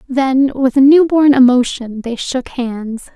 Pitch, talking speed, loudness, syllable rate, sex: 260 Hz, 150 wpm, -13 LUFS, 3.9 syllables/s, female